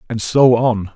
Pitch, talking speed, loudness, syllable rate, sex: 115 Hz, 190 wpm, -14 LUFS, 3.9 syllables/s, male